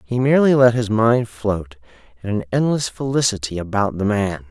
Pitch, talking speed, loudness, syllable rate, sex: 110 Hz, 175 wpm, -18 LUFS, 5.1 syllables/s, male